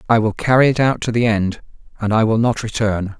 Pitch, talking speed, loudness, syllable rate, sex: 110 Hz, 245 wpm, -17 LUFS, 5.7 syllables/s, male